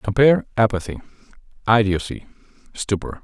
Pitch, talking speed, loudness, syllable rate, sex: 110 Hz, 75 wpm, -20 LUFS, 5.9 syllables/s, male